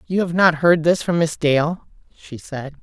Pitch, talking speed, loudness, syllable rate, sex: 160 Hz, 210 wpm, -18 LUFS, 4.4 syllables/s, female